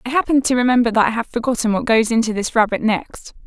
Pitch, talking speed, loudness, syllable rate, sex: 235 Hz, 245 wpm, -17 LUFS, 7.0 syllables/s, female